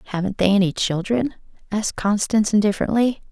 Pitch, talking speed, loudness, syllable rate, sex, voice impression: 205 Hz, 125 wpm, -20 LUFS, 6.3 syllables/s, female, feminine, adult-like, slightly powerful, slightly clear, intellectual, slightly sharp